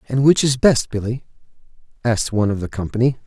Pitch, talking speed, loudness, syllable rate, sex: 120 Hz, 185 wpm, -19 LUFS, 6.7 syllables/s, male